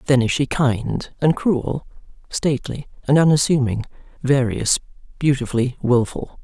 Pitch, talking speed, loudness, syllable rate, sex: 135 Hz, 110 wpm, -20 LUFS, 4.5 syllables/s, female